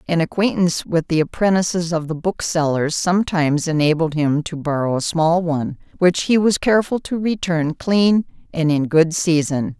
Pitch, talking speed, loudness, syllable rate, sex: 165 Hz, 165 wpm, -18 LUFS, 5.0 syllables/s, female